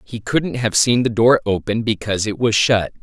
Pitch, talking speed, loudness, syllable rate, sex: 115 Hz, 220 wpm, -17 LUFS, 5.0 syllables/s, male